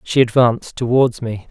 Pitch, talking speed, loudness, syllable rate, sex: 120 Hz, 160 wpm, -16 LUFS, 5.0 syllables/s, male